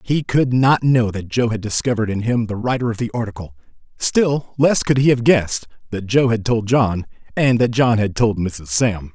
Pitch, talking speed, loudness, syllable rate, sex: 115 Hz, 215 wpm, -18 LUFS, 5.0 syllables/s, male